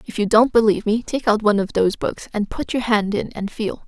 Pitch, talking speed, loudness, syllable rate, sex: 215 Hz, 280 wpm, -20 LUFS, 6.0 syllables/s, female